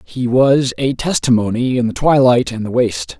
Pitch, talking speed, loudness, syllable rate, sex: 125 Hz, 190 wpm, -15 LUFS, 4.9 syllables/s, male